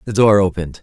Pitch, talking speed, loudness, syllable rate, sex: 100 Hz, 220 wpm, -15 LUFS, 7.3 syllables/s, male